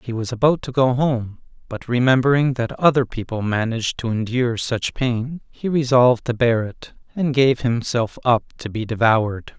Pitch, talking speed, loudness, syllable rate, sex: 120 Hz, 175 wpm, -20 LUFS, 4.9 syllables/s, male